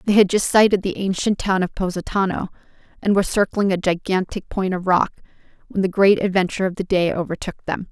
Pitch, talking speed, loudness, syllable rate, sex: 190 Hz, 195 wpm, -20 LUFS, 6.1 syllables/s, female